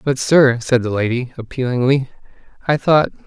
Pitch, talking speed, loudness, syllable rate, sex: 130 Hz, 145 wpm, -17 LUFS, 5.1 syllables/s, male